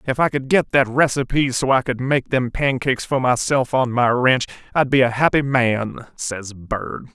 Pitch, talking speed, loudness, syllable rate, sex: 130 Hz, 200 wpm, -19 LUFS, 4.6 syllables/s, male